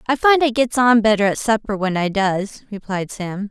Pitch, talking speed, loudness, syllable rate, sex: 215 Hz, 225 wpm, -18 LUFS, 4.9 syllables/s, female